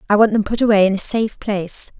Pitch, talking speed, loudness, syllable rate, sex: 210 Hz, 270 wpm, -17 LUFS, 7.4 syllables/s, female